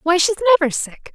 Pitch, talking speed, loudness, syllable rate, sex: 355 Hz, 210 wpm, -17 LUFS, 6.3 syllables/s, female